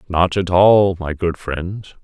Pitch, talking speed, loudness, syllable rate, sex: 90 Hz, 175 wpm, -16 LUFS, 3.4 syllables/s, male